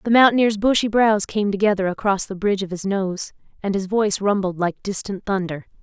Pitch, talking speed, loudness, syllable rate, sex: 200 Hz, 195 wpm, -20 LUFS, 5.7 syllables/s, female